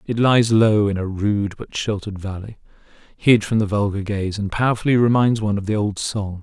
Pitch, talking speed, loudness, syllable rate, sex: 105 Hz, 205 wpm, -19 LUFS, 5.3 syllables/s, male